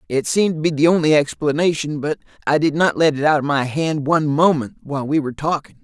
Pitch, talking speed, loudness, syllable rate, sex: 150 Hz, 235 wpm, -18 LUFS, 6.0 syllables/s, male